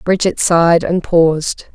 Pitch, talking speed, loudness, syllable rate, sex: 170 Hz, 135 wpm, -14 LUFS, 4.4 syllables/s, female